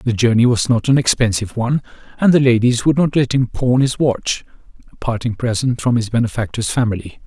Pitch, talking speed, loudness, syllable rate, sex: 120 Hz, 200 wpm, -17 LUFS, 5.8 syllables/s, male